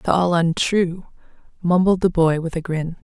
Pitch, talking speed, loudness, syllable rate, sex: 170 Hz, 175 wpm, -19 LUFS, 4.5 syllables/s, female